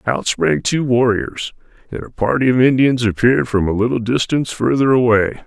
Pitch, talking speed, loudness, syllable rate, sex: 120 Hz, 175 wpm, -16 LUFS, 5.4 syllables/s, male